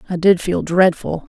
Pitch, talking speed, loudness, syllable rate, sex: 175 Hz, 180 wpm, -17 LUFS, 4.6 syllables/s, female